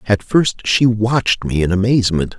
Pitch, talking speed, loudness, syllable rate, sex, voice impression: 105 Hz, 175 wpm, -15 LUFS, 4.9 syllables/s, male, masculine, middle-aged, thick, tensed, powerful, clear, cool, intellectual, calm, friendly, reassuring, wild, lively, slightly strict